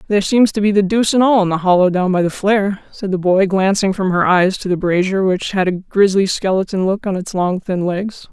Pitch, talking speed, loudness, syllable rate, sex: 190 Hz, 260 wpm, -16 LUFS, 5.6 syllables/s, female